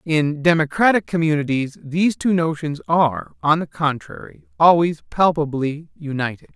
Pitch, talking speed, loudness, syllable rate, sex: 155 Hz, 120 wpm, -19 LUFS, 4.8 syllables/s, male